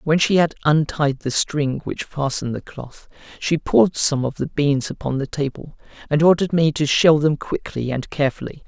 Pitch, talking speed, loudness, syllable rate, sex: 145 Hz, 195 wpm, -20 LUFS, 5.1 syllables/s, male